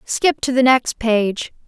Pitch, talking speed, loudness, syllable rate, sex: 245 Hz, 180 wpm, -17 LUFS, 3.4 syllables/s, female